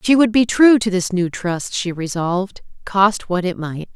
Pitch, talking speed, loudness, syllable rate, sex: 195 Hz, 210 wpm, -17 LUFS, 4.4 syllables/s, female